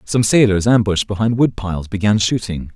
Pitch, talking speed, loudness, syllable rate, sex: 105 Hz, 175 wpm, -16 LUFS, 5.7 syllables/s, male